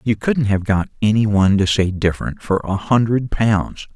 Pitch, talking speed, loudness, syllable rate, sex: 105 Hz, 195 wpm, -18 LUFS, 4.9 syllables/s, male